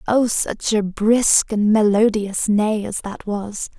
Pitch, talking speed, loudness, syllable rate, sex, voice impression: 210 Hz, 160 wpm, -18 LUFS, 3.4 syllables/s, female, feminine, slightly young, cute, slightly calm, friendly, slightly kind